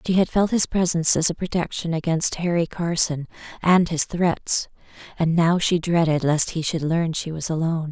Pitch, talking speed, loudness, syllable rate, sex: 165 Hz, 190 wpm, -21 LUFS, 5.0 syllables/s, female